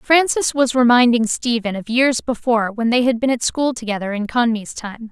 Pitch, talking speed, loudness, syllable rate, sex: 240 Hz, 200 wpm, -17 LUFS, 5.2 syllables/s, female